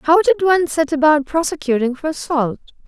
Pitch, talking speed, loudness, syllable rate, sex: 300 Hz, 165 wpm, -17 LUFS, 5.6 syllables/s, female